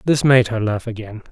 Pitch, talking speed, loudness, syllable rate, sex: 115 Hz, 230 wpm, -17 LUFS, 5.3 syllables/s, male